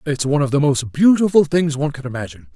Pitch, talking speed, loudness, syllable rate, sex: 145 Hz, 235 wpm, -17 LUFS, 7.1 syllables/s, male